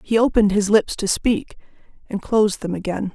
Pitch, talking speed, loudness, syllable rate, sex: 210 Hz, 190 wpm, -20 LUFS, 5.5 syllables/s, female